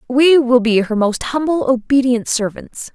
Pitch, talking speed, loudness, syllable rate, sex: 250 Hz, 165 wpm, -15 LUFS, 4.4 syllables/s, female